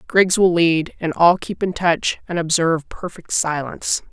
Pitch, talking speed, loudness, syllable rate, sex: 170 Hz, 175 wpm, -18 LUFS, 4.6 syllables/s, female